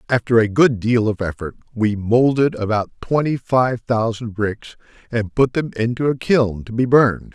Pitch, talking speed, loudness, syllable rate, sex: 115 Hz, 180 wpm, -18 LUFS, 4.6 syllables/s, male